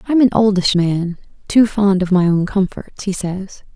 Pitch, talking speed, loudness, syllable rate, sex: 195 Hz, 210 wpm, -16 LUFS, 4.7 syllables/s, female